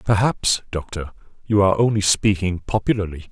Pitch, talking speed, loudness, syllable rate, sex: 100 Hz, 125 wpm, -20 LUFS, 5.3 syllables/s, male